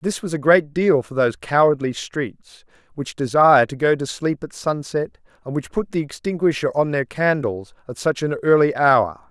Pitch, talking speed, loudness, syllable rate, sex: 140 Hz, 195 wpm, -20 LUFS, 4.8 syllables/s, male